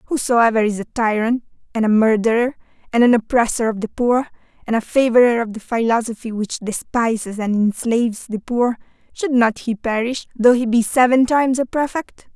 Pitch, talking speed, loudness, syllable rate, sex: 235 Hz, 175 wpm, -18 LUFS, 5.3 syllables/s, female